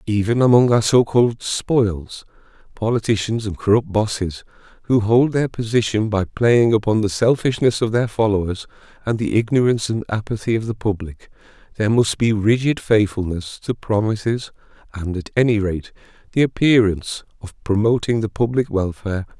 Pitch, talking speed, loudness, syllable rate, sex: 110 Hz, 145 wpm, -19 LUFS, 5.2 syllables/s, male